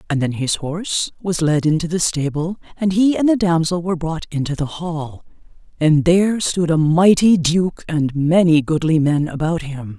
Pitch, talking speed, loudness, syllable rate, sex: 165 Hz, 185 wpm, -18 LUFS, 4.8 syllables/s, female